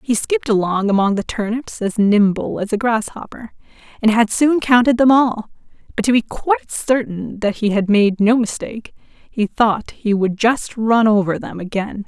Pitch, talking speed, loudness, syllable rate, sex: 220 Hz, 185 wpm, -17 LUFS, 4.7 syllables/s, female